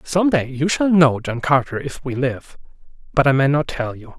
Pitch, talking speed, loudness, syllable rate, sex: 140 Hz, 230 wpm, -19 LUFS, 4.9 syllables/s, male